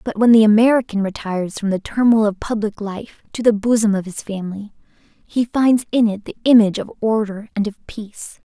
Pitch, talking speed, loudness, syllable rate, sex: 215 Hz, 195 wpm, -18 LUFS, 5.7 syllables/s, female